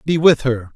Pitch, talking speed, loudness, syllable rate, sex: 135 Hz, 235 wpm, -16 LUFS, 4.6 syllables/s, male